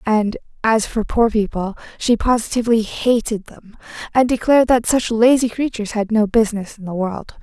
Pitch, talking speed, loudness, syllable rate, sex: 225 Hz, 170 wpm, -18 LUFS, 5.3 syllables/s, female